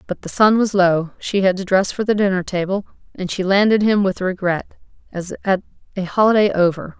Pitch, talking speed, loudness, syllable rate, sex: 190 Hz, 205 wpm, -18 LUFS, 5.5 syllables/s, female